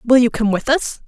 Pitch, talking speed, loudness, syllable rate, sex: 240 Hz, 280 wpm, -17 LUFS, 5.1 syllables/s, female